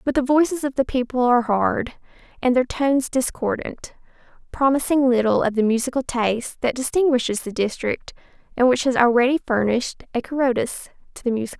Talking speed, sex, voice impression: 170 wpm, female, very feminine, young, slightly adult-like, very thin, tensed, slightly weak, bright, very soft, very clear, fluent, slightly raspy, very cute, intellectual, very refreshing, sincere, calm, friendly, reassuring, very unique, elegant, slightly wild, sweet, lively, kind, slightly modest, very light